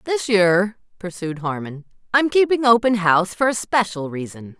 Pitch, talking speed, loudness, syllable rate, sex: 200 Hz, 155 wpm, -19 LUFS, 4.8 syllables/s, female